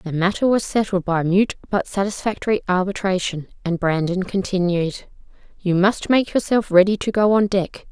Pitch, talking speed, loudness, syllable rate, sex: 190 Hz, 160 wpm, -20 LUFS, 5.0 syllables/s, female